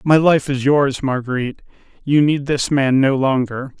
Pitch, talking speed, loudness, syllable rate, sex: 135 Hz, 175 wpm, -17 LUFS, 4.6 syllables/s, male